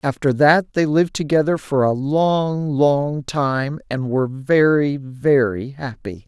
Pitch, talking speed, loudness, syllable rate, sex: 140 Hz, 145 wpm, -19 LUFS, 3.8 syllables/s, male